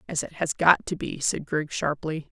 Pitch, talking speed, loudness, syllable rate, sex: 155 Hz, 225 wpm, -25 LUFS, 4.7 syllables/s, female